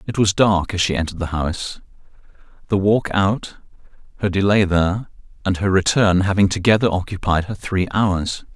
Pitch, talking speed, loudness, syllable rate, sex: 95 Hz, 155 wpm, -19 LUFS, 5.3 syllables/s, male